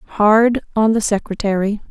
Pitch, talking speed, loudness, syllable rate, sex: 210 Hz, 125 wpm, -16 LUFS, 4.2 syllables/s, female